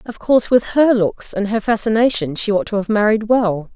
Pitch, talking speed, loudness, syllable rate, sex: 215 Hz, 225 wpm, -16 LUFS, 5.3 syllables/s, female